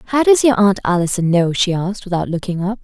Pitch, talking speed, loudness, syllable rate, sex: 195 Hz, 235 wpm, -16 LUFS, 5.8 syllables/s, female